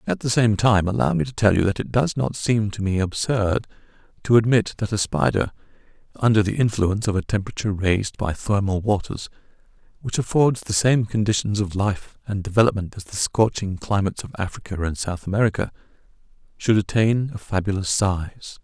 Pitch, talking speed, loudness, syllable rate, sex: 105 Hz, 175 wpm, -22 LUFS, 5.5 syllables/s, male